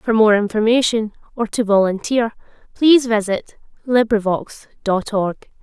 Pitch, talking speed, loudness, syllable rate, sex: 220 Hz, 115 wpm, -17 LUFS, 4.7 syllables/s, female